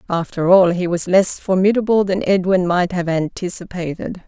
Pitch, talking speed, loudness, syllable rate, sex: 180 Hz, 155 wpm, -17 LUFS, 5.0 syllables/s, female